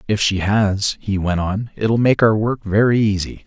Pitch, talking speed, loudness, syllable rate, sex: 105 Hz, 210 wpm, -18 LUFS, 4.3 syllables/s, male